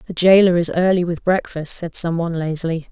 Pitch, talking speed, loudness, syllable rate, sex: 170 Hz, 205 wpm, -17 LUFS, 5.9 syllables/s, female